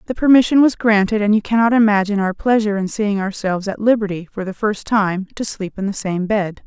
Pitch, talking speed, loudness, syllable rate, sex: 205 Hz, 225 wpm, -17 LUFS, 6.0 syllables/s, female